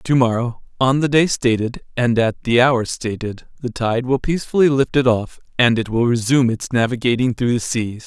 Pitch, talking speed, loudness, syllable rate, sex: 125 Hz, 195 wpm, -18 LUFS, 5.2 syllables/s, male